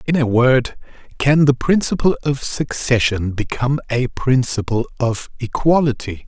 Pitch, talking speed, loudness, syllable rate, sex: 130 Hz, 125 wpm, -18 LUFS, 4.5 syllables/s, male